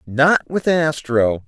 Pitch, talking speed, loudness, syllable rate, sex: 140 Hz, 120 wpm, -17 LUFS, 3.1 syllables/s, male